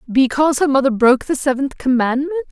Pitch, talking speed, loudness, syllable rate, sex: 275 Hz, 165 wpm, -16 LUFS, 6.4 syllables/s, female